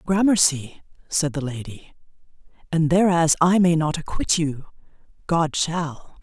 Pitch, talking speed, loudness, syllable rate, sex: 160 Hz, 125 wpm, -21 LUFS, 4.1 syllables/s, female